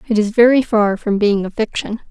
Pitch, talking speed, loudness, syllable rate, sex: 215 Hz, 230 wpm, -16 LUFS, 5.3 syllables/s, female